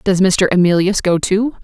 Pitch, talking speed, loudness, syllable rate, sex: 190 Hz, 185 wpm, -14 LUFS, 4.7 syllables/s, female